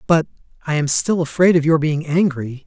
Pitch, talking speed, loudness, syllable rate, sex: 155 Hz, 200 wpm, -17 LUFS, 5.2 syllables/s, male